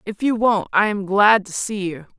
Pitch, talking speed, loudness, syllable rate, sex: 205 Hz, 245 wpm, -19 LUFS, 4.7 syllables/s, female